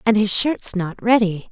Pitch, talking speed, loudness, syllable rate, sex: 210 Hz, 200 wpm, -17 LUFS, 4.3 syllables/s, female